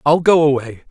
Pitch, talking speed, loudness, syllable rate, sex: 145 Hz, 200 wpm, -15 LUFS, 5.8 syllables/s, male